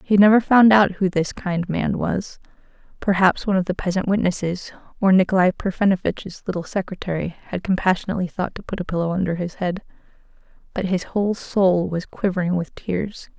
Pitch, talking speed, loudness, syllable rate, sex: 185 Hz, 170 wpm, -21 LUFS, 5.5 syllables/s, female